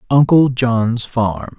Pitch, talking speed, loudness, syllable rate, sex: 120 Hz, 115 wpm, -15 LUFS, 2.9 syllables/s, male